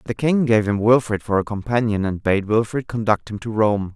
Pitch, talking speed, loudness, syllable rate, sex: 110 Hz, 225 wpm, -20 LUFS, 5.3 syllables/s, male